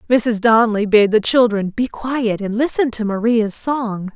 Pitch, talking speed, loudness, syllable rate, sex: 225 Hz, 175 wpm, -17 LUFS, 4.3 syllables/s, female